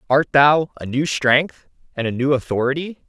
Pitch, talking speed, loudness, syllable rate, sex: 140 Hz, 175 wpm, -18 LUFS, 4.6 syllables/s, male